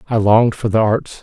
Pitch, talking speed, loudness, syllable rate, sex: 110 Hz, 245 wpm, -15 LUFS, 5.8 syllables/s, male